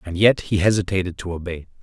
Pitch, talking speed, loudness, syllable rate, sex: 95 Hz, 200 wpm, -21 LUFS, 6.3 syllables/s, male